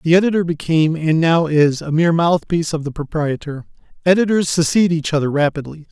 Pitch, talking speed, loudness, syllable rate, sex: 160 Hz, 170 wpm, -17 LUFS, 5.9 syllables/s, male